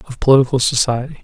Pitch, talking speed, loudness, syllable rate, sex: 130 Hz, 145 wpm, -15 LUFS, 7.1 syllables/s, male